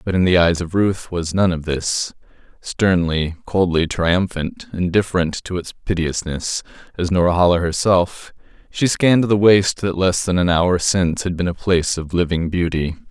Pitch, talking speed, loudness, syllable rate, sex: 90 Hz, 165 wpm, -18 LUFS, 4.7 syllables/s, male